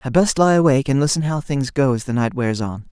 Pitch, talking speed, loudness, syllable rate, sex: 140 Hz, 290 wpm, -18 LUFS, 6.1 syllables/s, male